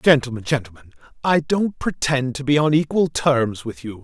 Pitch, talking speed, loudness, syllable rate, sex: 140 Hz, 180 wpm, -20 LUFS, 4.9 syllables/s, male